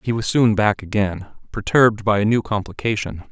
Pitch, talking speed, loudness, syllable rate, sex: 105 Hz, 200 wpm, -19 LUFS, 5.6 syllables/s, male